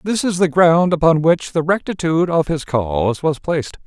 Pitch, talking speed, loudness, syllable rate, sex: 160 Hz, 200 wpm, -17 LUFS, 5.2 syllables/s, male